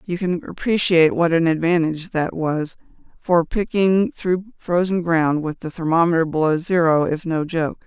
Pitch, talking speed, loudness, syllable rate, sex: 170 Hz, 160 wpm, -19 LUFS, 4.7 syllables/s, female